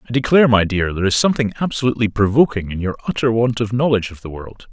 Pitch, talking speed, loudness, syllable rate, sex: 110 Hz, 230 wpm, -17 LUFS, 7.4 syllables/s, male